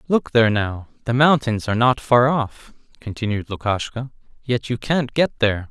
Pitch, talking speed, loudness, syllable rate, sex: 120 Hz, 170 wpm, -20 LUFS, 5.0 syllables/s, male